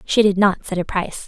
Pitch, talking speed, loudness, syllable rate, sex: 195 Hz, 280 wpm, -19 LUFS, 6.0 syllables/s, female